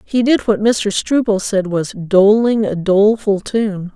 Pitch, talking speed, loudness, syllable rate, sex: 210 Hz, 165 wpm, -15 LUFS, 3.9 syllables/s, female